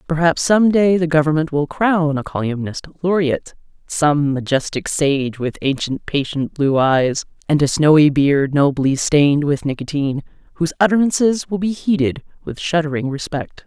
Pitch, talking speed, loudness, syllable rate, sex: 150 Hz, 150 wpm, -17 LUFS, 4.8 syllables/s, female